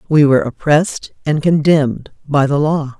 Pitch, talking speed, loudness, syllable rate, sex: 145 Hz, 160 wpm, -15 LUFS, 5.1 syllables/s, female